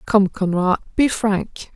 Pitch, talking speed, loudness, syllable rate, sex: 200 Hz, 135 wpm, -19 LUFS, 3.5 syllables/s, female